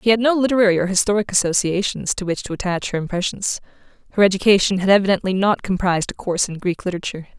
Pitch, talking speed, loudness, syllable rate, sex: 190 Hz, 195 wpm, -19 LUFS, 7.1 syllables/s, female